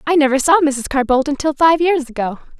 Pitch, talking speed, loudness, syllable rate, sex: 285 Hz, 230 wpm, -15 LUFS, 5.8 syllables/s, female